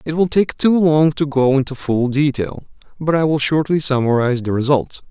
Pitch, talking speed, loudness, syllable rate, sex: 145 Hz, 200 wpm, -17 LUFS, 5.2 syllables/s, male